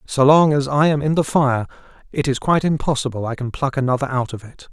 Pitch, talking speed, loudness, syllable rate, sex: 135 Hz, 240 wpm, -19 LUFS, 6.1 syllables/s, male